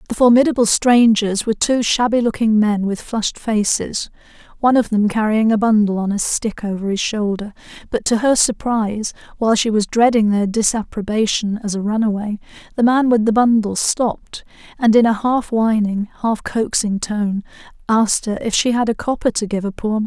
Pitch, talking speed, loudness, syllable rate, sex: 220 Hz, 185 wpm, -17 LUFS, 5.3 syllables/s, female